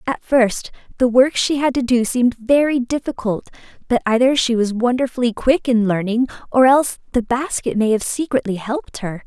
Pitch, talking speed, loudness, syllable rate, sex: 245 Hz, 180 wpm, -18 LUFS, 5.3 syllables/s, female